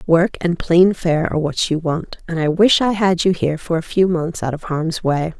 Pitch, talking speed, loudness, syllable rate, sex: 170 Hz, 255 wpm, -18 LUFS, 4.9 syllables/s, female